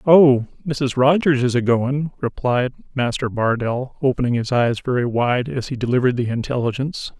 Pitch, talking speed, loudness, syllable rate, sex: 130 Hz, 160 wpm, -19 LUFS, 5.1 syllables/s, male